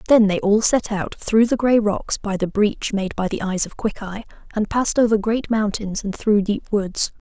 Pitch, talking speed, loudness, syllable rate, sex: 210 Hz, 225 wpm, -20 LUFS, 4.7 syllables/s, female